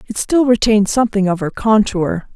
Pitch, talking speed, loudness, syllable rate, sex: 210 Hz, 180 wpm, -15 LUFS, 5.5 syllables/s, female